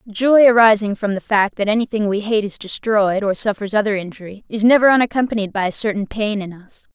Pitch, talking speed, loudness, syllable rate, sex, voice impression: 210 Hz, 205 wpm, -17 LUFS, 5.8 syllables/s, female, very feminine, young, thin, very tensed, very powerful, very bright, hard, very clear, very fluent, cute, slightly cool, intellectual, slightly refreshing, sincere, slightly calm, friendly, reassuring, very unique, elegant, wild, very sweet, very lively, strict, intense, sharp, very light